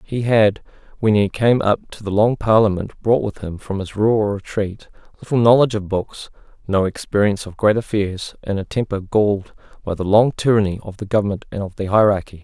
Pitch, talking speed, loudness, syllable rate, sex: 105 Hz, 200 wpm, -19 LUFS, 5.5 syllables/s, male